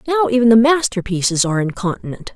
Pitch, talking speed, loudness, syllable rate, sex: 220 Hz, 155 wpm, -16 LUFS, 6.4 syllables/s, female